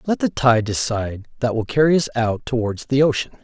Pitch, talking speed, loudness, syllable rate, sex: 125 Hz, 210 wpm, -20 LUFS, 5.6 syllables/s, male